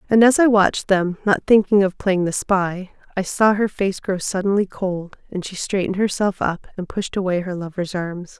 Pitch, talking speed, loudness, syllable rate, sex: 190 Hz, 195 wpm, -20 LUFS, 4.9 syllables/s, female